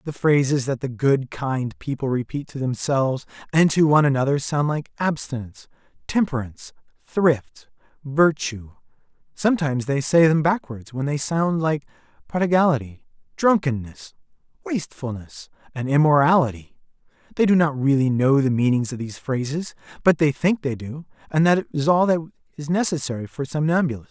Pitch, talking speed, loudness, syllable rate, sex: 145 Hz, 145 wpm, -21 LUFS, 5.3 syllables/s, male